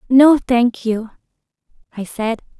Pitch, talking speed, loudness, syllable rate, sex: 235 Hz, 115 wpm, -16 LUFS, 3.4 syllables/s, female